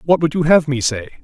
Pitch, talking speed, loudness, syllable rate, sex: 150 Hz, 290 wpm, -16 LUFS, 6.0 syllables/s, male